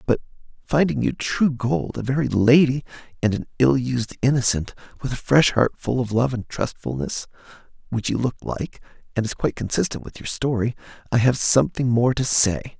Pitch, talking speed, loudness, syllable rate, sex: 120 Hz, 175 wpm, -22 LUFS, 5.2 syllables/s, male